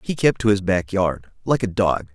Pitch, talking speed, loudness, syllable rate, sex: 100 Hz, 250 wpm, -20 LUFS, 4.8 syllables/s, male